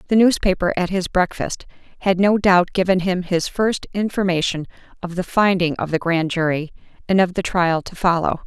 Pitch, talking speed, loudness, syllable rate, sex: 180 Hz, 185 wpm, -19 LUFS, 5.1 syllables/s, female